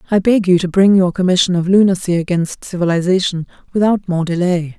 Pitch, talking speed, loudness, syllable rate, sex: 180 Hz, 175 wpm, -15 LUFS, 5.8 syllables/s, female